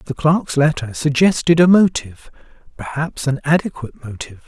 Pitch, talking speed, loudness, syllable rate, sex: 145 Hz, 135 wpm, -16 LUFS, 5.4 syllables/s, male